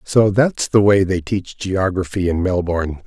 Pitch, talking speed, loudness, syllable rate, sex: 95 Hz, 175 wpm, -18 LUFS, 4.4 syllables/s, male